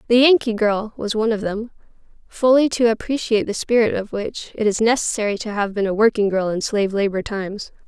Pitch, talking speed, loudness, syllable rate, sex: 215 Hz, 205 wpm, -19 LUFS, 5.9 syllables/s, female